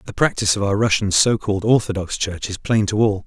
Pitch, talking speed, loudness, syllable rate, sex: 105 Hz, 220 wpm, -19 LUFS, 6.1 syllables/s, male